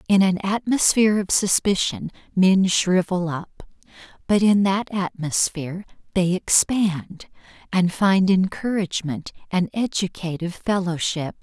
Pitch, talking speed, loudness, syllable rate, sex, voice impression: 190 Hz, 105 wpm, -21 LUFS, 4.2 syllables/s, female, feminine, adult-like, relaxed, slightly weak, slightly dark, fluent, raspy, intellectual, calm, reassuring, elegant, kind, slightly sharp, modest